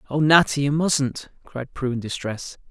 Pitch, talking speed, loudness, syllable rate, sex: 140 Hz, 180 wpm, -21 LUFS, 4.4 syllables/s, male